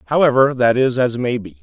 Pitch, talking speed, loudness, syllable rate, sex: 125 Hz, 220 wpm, -16 LUFS, 5.8 syllables/s, male